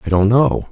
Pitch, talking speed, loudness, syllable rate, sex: 100 Hz, 250 wpm, -14 LUFS, 5.1 syllables/s, male